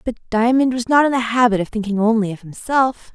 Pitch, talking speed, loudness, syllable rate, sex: 230 Hz, 230 wpm, -17 LUFS, 5.8 syllables/s, female